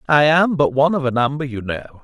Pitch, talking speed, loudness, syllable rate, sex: 140 Hz, 265 wpm, -17 LUFS, 5.9 syllables/s, male